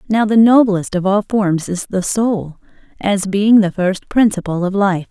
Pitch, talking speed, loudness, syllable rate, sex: 200 Hz, 190 wpm, -15 LUFS, 4.3 syllables/s, female